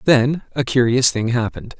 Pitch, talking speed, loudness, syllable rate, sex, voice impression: 125 Hz, 165 wpm, -18 LUFS, 5.2 syllables/s, male, masculine, adult-like, refreshing, sincere, slightly friendly